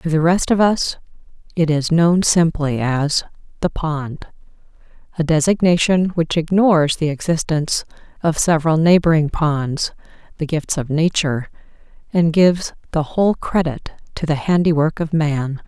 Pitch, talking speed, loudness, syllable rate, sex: 160 Hz, 135 wpm, -18 LUFS, 4.6 syllables/s, female